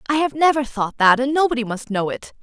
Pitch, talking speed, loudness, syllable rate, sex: 255 Hz, 245 wpm, -19 LUFS, 6.1 syllables/s, female